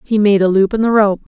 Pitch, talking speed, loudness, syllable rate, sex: 205 Hz, 315 wpm, -13 LUFS, 6.1 syllables/s, female